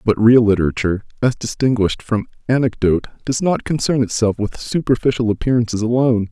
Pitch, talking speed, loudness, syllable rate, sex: 115 Hz, 145 wpm, -17 LUFS, 6.2 syllables/s, male